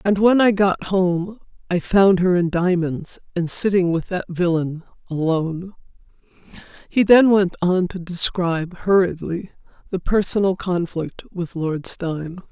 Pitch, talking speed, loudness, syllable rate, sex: 180 Hz, 140 wpm, -20 LUFS, 4.3 syllables/s, female